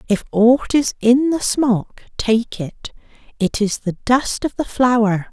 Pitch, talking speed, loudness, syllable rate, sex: 235 Hz, 170 wpm, -18 LUFS, 3.6 syllables/s, female